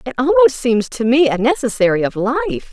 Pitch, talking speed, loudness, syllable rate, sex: 245 Hz, 200 wpm, -15 LUFS, 5.8 syllables/s, female